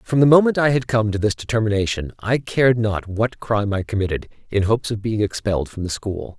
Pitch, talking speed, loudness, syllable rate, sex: 110 Hz, 225 wpm, -20 LUFS, 5.9 syllables/s, male